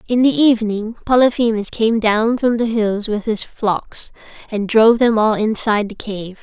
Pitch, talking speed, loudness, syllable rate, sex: 220 Hz, 175 wpm, -16 LUFS, 4.7 syllables/s, female